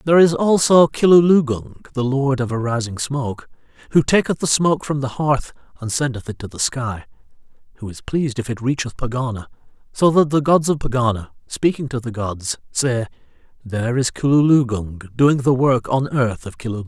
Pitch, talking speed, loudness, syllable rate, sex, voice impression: 130 Hz, 180 wpm, -19 LUFS, 5.5 syllables/s, male, very masculine, very adult-like, very middle-aged, thick, slightly tensed, powerful, slightly bright, hard, slightly muffled, fluent, cool, very intellectual, slightly refreshing, sincere, calm, very mature, friendly, reassuring, unique, slightly elegant, very wild, slightly sweet, lively, kind, slightly modest